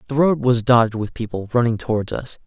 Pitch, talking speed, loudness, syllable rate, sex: 120 Hz, 220 wpm, -19 LUFS, 5.9 syllables/s, male